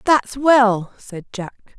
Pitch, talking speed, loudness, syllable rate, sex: 230 Hz, 135 wpm, -16 LUFS, 2.6 syllables/s, female